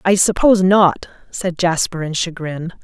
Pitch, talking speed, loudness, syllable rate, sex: 175 Hz, 150 wpm, -16 LUFS, 4.6 syllables/s, female